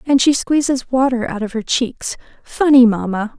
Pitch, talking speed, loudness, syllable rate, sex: 245 Hz, 175 wpm, -16 LUFS, 4.7 syllables/s, female